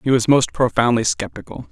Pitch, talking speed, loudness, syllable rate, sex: 125 Hz, 175 wpm, -17 LUFS, 5.6 syllables/s, male